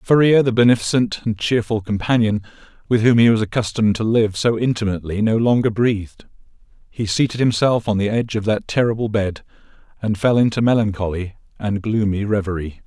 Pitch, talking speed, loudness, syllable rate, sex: 110 Hz, 165 wpm, -18 LUFS, 5.8 syllables/s, male